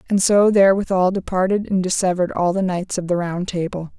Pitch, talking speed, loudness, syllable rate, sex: 185 Hz, 195 wpm, -19 LUFS, 5.9 syllables/s, female